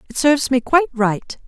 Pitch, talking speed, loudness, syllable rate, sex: 260 Hz, 205 wpm, -17 LUFS, 5.7 syllables/s, female